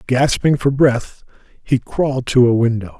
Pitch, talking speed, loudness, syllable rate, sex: 125 Hz, 160 wpm, -16 LUFS, 4.5 syllables/s, male